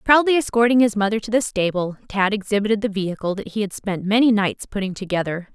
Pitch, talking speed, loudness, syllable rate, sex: 210 Hz, 205 wpm, -20 LUFS, 6.2 syllables/s, female